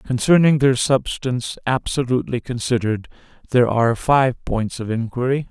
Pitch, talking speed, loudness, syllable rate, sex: 125 Hz, 120 wpm, -19 LUFS, 5.2 syllables/s, male